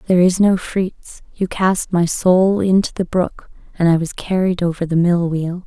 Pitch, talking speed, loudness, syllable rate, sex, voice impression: 180 Hz, 200 wpm, -17 LUFS, 4.5 syllables/s, female, feminine, slightly adult-like, slightly weak, soft, slightly cute, slightly calm, kind, modest